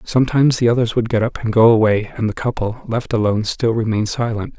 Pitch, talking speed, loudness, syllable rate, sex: 115 Hz, 220 wpm, -17 LUFS, 6.5 syllables/s, male